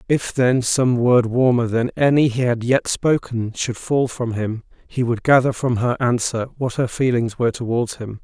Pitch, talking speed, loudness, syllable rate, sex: 120 Hz, 195 wpm, -19 LUFS, 4.6 syllables/s, male